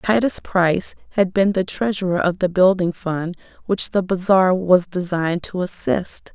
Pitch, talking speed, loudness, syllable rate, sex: 185 Hz, 160 wpm, -19 LUFS, 4.5 syllables/s, female